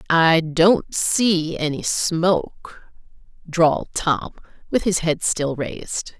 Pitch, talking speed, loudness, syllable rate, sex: 165 Hz, 115 wpm, -20 LUFS, 3.3 syllables/s, female